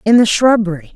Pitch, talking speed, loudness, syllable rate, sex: 205 Hz, 190 wpm, -13 LUFS, 5.9 syllables/s, female